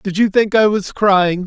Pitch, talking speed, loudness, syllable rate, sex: 200 Hz, 245 wpm, -14 LUFS, 4.2 syllables/s, male